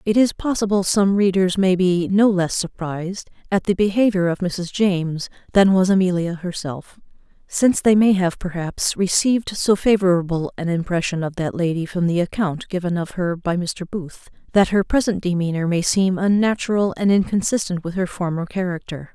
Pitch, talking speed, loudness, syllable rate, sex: 185 Hz, 170 wpm, -20 LUFS, 5.1 syllables/s, female